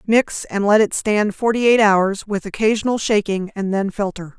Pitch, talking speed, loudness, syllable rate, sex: 205 Hz, 190 wpm, -18 LUFS, 4.7 syllables/s, female